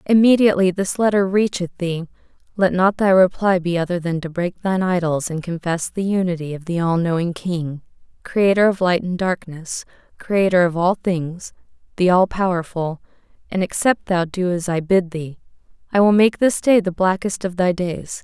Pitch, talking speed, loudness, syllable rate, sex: 180 Hz, 180 wpm, -19 LUFS, 5.0 syllables/s, female